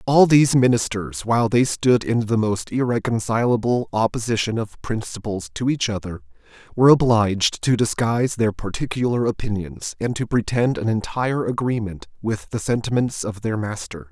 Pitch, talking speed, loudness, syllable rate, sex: 115 Hz, 150 wpm, -21 LUFS, 5.2 syllables/s, male